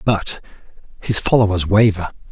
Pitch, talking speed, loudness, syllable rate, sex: 100 Hz, 105 wpm, -16 LUFS, 4.8 syllables/s, male